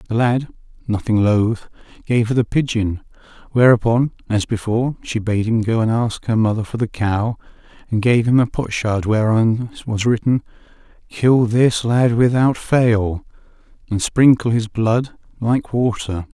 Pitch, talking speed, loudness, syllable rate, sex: 115 Hz, 155 wpm, -18 LUFS, 4.4 syllables/s, male